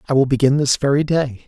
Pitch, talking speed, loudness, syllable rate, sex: 140 Hz, 245 wpm, -17 LUFS, 6.2 syllables/s, male